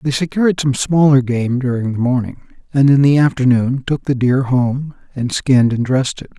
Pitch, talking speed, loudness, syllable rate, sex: 130 Hz, 195 wpm, -15 LUFS, 5.3 syllables/s, male